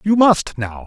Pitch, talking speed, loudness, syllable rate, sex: 160 Hz, 210 wpm, -16 LUFS, 3.9 syllables/s, male